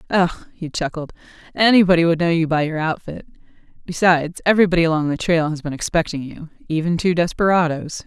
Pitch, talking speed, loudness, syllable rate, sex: 165 Hz, 165 wpm, -18 LUFS, 6.1 syllables/s, female